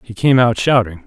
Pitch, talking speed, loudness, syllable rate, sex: 115 Hz, 225 wpm, -14 LUFS, 5.2 syllables/s, male